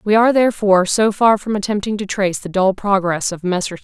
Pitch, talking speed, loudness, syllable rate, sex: 200 Hz, 220 wpm, -16 LUFS, 5.9 syllables/s, female